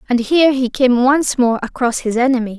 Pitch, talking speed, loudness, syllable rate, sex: 250 Hz, 210 wpm, -15 LUFS, 5.5 syllables/s, female